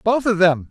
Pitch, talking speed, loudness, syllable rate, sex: 195 Hz, 255 wpm, -17 LUFS, 4.9 syllables/s, male